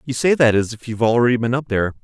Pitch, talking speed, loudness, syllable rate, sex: 120 Hz, 295 wpm, -18 LUFS, 7.6 syllables/s, male